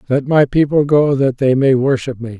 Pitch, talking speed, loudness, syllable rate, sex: 135 Hz, 225 wpm, -14 LUFS, 5.0 syllables/s, male